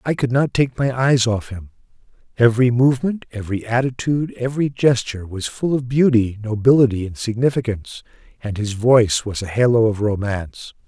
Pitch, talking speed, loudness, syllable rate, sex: 120 Hz, 160 wpm, -19 LUFS, 5.7 syllables/s, male